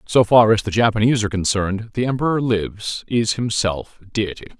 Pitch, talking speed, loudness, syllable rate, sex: 110 Hz, 170 wpm, -19 LUFS, 5.8 syllables/s, male